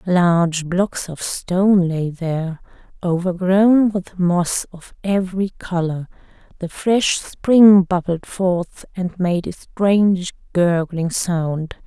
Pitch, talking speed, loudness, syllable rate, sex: 180 Hz, 115 wpm, -18 LUFS, 3.4 syllables/s, female